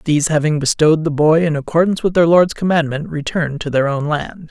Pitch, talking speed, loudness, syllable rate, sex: 155 Hz, 215 wpm, -16 LUFS, 6.2 syllables/s, male